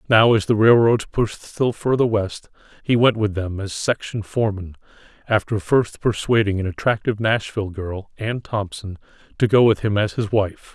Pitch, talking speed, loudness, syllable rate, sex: 105 Hz, 165 wpm, -20 LUFS, 4.9 syllables/s, male